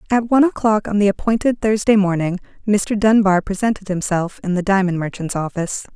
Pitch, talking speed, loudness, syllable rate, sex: 200 Hz, 170 wpm, -18 LUFS, 5.8 syllables/s, female